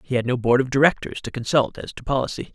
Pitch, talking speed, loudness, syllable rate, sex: 130 Hz, 260 wpm, -22 LUFS, 6.5 syllables/s, male